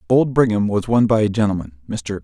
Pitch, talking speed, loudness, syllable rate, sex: 105 Hz, 190 wpm, -18 LUFS, 5.7 syllables/s, male